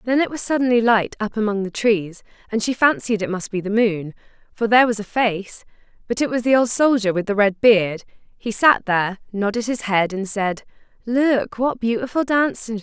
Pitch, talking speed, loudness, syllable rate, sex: 220 Hz, 210 wpm, -19 LUFS, 5.2 syllables/s, female